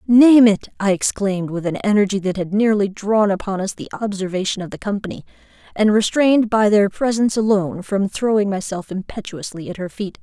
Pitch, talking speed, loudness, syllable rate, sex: 200 Hz, 180 wpm, -18 LUFS, 5.7 syllables/s, female